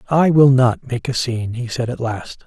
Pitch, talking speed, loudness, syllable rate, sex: 125 Hz, 245 wpm, -17 LUFS, 4.9 syllables/s, male